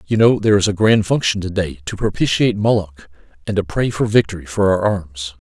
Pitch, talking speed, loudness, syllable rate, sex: 100 Hz, 210 wpm, -17 LUFS, 5.8 syllables/s, male